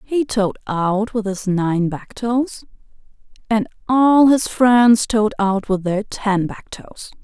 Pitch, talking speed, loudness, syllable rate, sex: 215 Hz, 160 wpm, -18 LUFS, 3.3 syllables/s, female